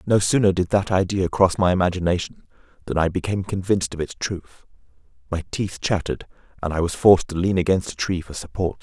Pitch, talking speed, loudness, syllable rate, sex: 90 Hz, 195 wpm, -22 LUFS, 6.1 syllables/s, male